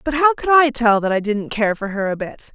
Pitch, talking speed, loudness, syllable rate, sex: 240 Hz, 305 wpm, -17 LUFS, 5.3 syllables/s, female